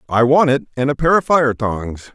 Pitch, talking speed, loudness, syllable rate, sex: 130 Hz, 250 wpm, -16 LUFS, 5.0 syllables/s, male